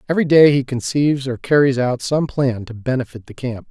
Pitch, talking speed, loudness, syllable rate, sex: 130 Hz, 210 wpm, -17 LUFS, 5.7 syllables/s, male